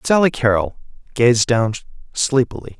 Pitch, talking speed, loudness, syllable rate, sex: 120 Hz, 105 wpm, -17 LUFS, 4.6 syllables/s, male